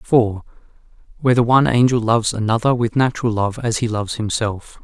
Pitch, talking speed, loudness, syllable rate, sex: 115 Hz, 160 wpm, -18 LUFS, 6.4 syllables/s, male